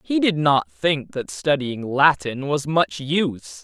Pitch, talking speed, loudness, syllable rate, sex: 145 Hz, 165 wpm, -21 LUFS, 3.7 syllables/s, male